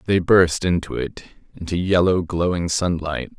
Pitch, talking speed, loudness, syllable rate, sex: 85 Hz, 125 wpm, -20 LUFS, 4.5 syllables/s, male